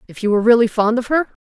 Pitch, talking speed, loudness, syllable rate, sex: 230 Hz, 295 wpm, -16 LUFS, 7.8 syllables/s, female